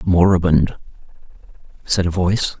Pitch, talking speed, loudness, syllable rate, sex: 90 Hz, 90 wpm, -17 LUFS, 5.2 syllables/s, male